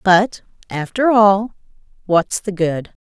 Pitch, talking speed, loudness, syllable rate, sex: 195 Hz, 120 wpm, -17 LUFS, 3.3 syllables/s, female